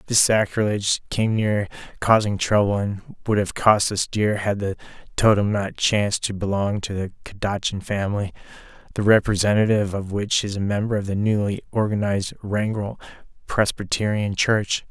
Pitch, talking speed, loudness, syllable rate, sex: 100 Hz, 150 wpm, -22 LUFS, 5.1 syllables/s, male